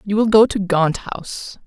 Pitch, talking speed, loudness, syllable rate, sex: 195 Hz, 215 wpm, -17 LUFS, 4.6 syllables/s, female